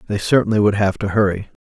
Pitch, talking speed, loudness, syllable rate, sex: 105 Hz, 220 wpm, -17 LUFS, 6.6 syllables/s, male